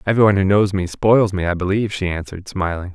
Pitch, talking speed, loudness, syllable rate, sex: 95 Hz, 225 wpm, -18 LUFS, 6.7 syllables/s, male